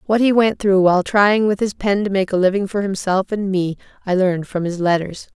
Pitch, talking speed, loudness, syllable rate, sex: 195 Hz, 245 wpm, -18 LUFS, 5.5 syllables/s, female